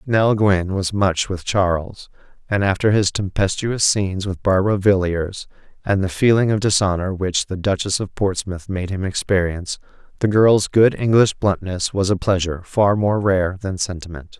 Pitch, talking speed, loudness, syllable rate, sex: 95 Hz, 165 wpm, -19 LUFS, 4.8 syllables/s, male